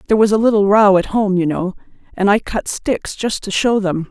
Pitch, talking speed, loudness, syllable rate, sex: 205 Hz, 250 wpm, -16 LUFS, 5.4 syllables/s, female